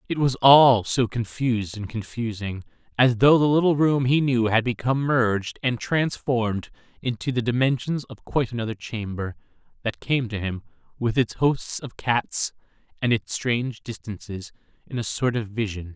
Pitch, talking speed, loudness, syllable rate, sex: 120 Hz, 165 wpm, -23 LUFS, 4.8 syllables/s, male